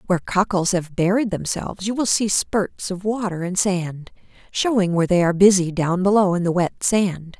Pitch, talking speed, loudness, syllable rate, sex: 190 Hz, 195 wpm, -20 LUFS, 5.2 syllables/s, female